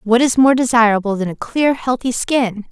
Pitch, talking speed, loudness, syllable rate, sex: 235 Hz, 200 wpm, -15 LUFS, 4.9 syllables/s, female